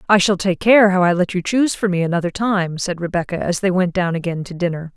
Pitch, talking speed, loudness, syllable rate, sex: 185 Hz, 265 wpm, -18 LUFS, 6.1 syllables/s, female